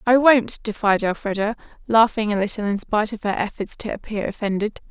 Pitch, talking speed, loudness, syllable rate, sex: 215 Hz, 185 wpm, -21 LUFS, 5.7 syllables/s, female